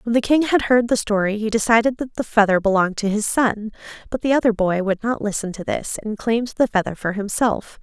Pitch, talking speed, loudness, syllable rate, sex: 220 Hz, 240 wpm, -20 LUFS, 5.8 syllables/s, female